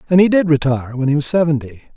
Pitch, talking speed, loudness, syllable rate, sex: 150 Hz, 245 wpm, -16 LUFS, 7.4 syllables/s, male